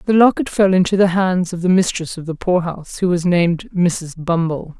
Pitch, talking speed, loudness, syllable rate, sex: 180 Hz, 215 wpm, -17 LUFS, 5.3 syllables/s, female